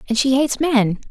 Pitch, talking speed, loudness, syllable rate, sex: 250 Hz, 220 wpm, -17 LUFS, 6.0 syllables/s, female